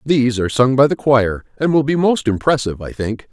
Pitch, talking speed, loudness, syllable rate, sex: 130 Hz, 235 wpm, -16 LUFS, 5.8 syllables/s, male